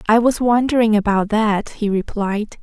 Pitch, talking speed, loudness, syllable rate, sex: 215 Hz, 160 wpm, -17 LUFS, 4.5 syllables/s, female